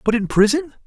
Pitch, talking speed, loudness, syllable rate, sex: 230 Hz, 205 wpm, -18 LUFS, 6.1 syllables/s, male